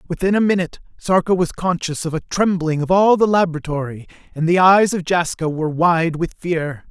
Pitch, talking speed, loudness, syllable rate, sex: 170 Hz, 190 wpm, -18 LUFS, 5.5 syllables/s, male